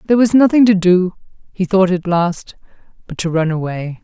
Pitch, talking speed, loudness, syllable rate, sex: 185 Hz, 195 wpm, -15 LUFS, 5.2 syllables/s, female